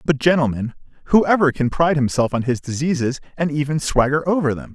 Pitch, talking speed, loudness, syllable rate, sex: 145 Hz, 175 wpm, -19 LUFS, 5.9 syllables/s, male